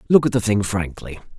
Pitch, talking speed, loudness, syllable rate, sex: 105 Hz, 215 wpm, -20 LUFS, 5.7 syllables/s, male